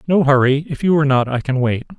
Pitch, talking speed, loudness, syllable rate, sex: 140 Hz, 270 wpm, -16 LUFS, 6.6 syllables/s, male